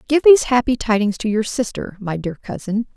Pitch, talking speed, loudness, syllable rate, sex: 225 Hz, 205 wpm, -18 LUFS, 5.7 syllables/s, female